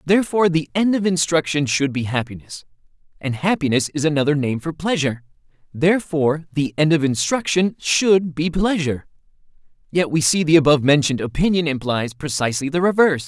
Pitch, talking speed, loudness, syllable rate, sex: 155 Hz, 150 wpm, -19 LUFS, 5.9 syllables/s, male